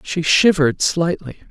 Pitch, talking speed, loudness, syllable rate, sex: 160 Hz, 120 wpm, -16 LUFS, 4.6 syllables/s, female